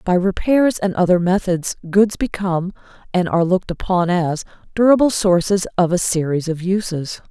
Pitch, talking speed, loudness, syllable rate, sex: 185 Hz, 155 wpm, -18 LUFS, 5.2 syllables/s, female